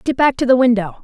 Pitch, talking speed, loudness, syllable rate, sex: 245 Hz, 290 wpm, -15 LUFS, 6.8 syllables/s, female